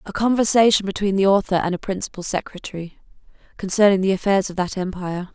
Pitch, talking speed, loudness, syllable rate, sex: 195 Hz, 170 wpm, -20 LUFS, 6.4 syllables/s, female